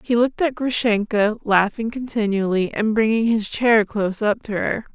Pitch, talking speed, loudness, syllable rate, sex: 220 Hz, 170 wpm, -20 LUFS, 4.9 syllables/s, female